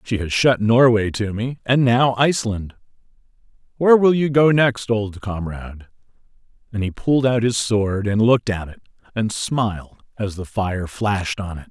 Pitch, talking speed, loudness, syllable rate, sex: 110 Hz, 175 wpm, -19 LUFS, 4.9 syllables/s, male